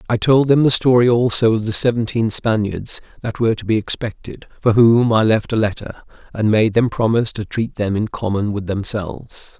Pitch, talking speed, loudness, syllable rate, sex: 110 Hz, 200 wpm, -17 LUFS, 5.2 syllables/s, male